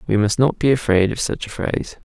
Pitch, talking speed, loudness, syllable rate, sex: 115 Hz, 255 wpm, -19 LUFS, 5.9 syllables/s, male